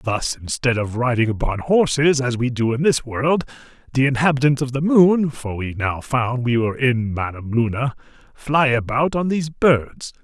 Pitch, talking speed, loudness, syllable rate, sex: 130 Hz, 180 wpm, -19 LUFS, 3.7 syllables/s, male